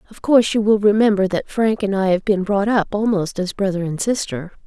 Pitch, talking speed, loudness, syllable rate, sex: 200 Hz, 230 wpm, -18 LUFS, 5.6 syllables/s, female